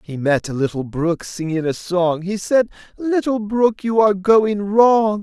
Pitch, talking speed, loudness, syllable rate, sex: 195 Hz, 185 wpm, -18 LUFS, 4.1 syllables/s, male